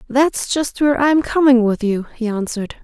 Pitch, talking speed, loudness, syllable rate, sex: 250 Hz, 190 wpm, -17 LUFS, 5.0 syllables/s, female